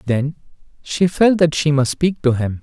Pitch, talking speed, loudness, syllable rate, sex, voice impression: 150 Hz, 205 wpm, -17 LUFS, 4.5 syllables/s, male, masculine, adult-like, tensed, slightly powerful, slightly bright, clear, slightly halting, intellectual, calm, friendly, slightly reassuring, lively, slightly kind